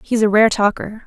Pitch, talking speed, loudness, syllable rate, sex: 220 Hz, 225 wpm, -15 LUFS, 5.2 syllables/s, female